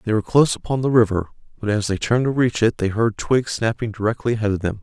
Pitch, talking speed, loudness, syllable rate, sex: 110 Hz, 260 wpm, -20 LUFS, 6.9 syllables/s, male